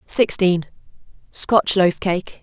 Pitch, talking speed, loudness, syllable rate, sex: 185 Hz, 75 wpm, -18 LUFS, 3.2 syllables/s, female